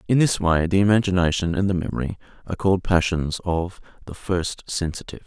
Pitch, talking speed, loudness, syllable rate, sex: 90 Hz, 170 wpm, -22 LUFS, 6.1 syllables/s, male